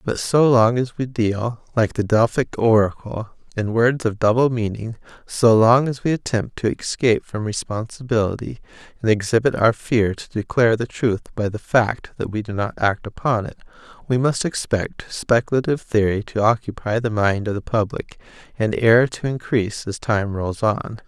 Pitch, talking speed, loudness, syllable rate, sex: 115 Hz, 175 wpm, -20 LUFS, 4.9 syllables/s, male